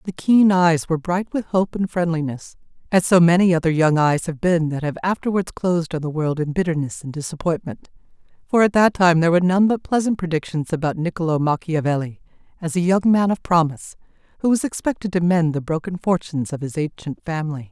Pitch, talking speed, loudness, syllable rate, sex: 170 Hz, 200 wpm, -20 LUFS, 5.9 syllables/s, female